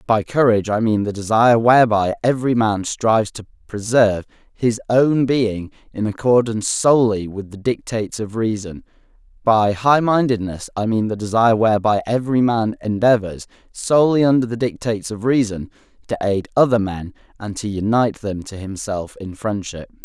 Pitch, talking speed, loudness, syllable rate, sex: 110 Hz, 155 wpm, -18 LUFS, 5.4 syllables/s, male